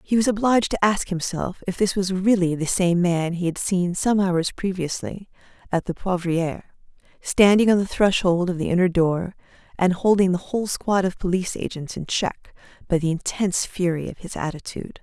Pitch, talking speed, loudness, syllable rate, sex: 185 Hz, 190 wpm, -22 LUFS, 5.3 syllables/s, female